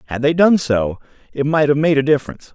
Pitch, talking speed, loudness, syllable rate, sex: 145 Hz, 235 wpm, -16 LUFS, 6.5 syllables/s, male